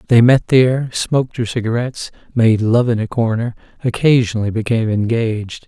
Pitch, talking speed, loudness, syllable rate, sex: 115 Hz, 150 wpm, -16 LUFS, 5.5 syllables/s, male